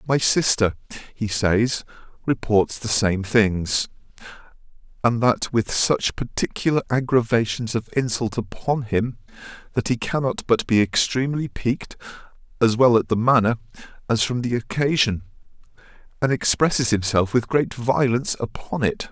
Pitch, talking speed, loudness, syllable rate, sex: 115 Hz, 130 wpm, -21 LUFS, 4.6 syllables/s, male